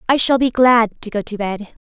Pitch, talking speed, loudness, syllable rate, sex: 230 Hz, 265 wpm, -16 LUFS, 5.0 syllables/s, female